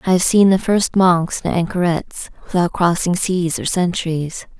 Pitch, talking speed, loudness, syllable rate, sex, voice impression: 180 Hz, 170 wpm, -17 LUFS, 4.5 syllables/s, female, very feminine, slightly young, adult-like, thin, very relaxed, very weak, very dark, very soft, very muffled, slightly halting, raspy, cute, intellectual, sincere, very calm, friendly, slightly reassuring, very unique, elegant, wild, sweet, very kind, very modest, light